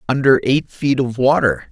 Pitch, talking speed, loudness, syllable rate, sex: 130 Hz, 175 wpm, -16 LUFS, 4.6 syllables/s, male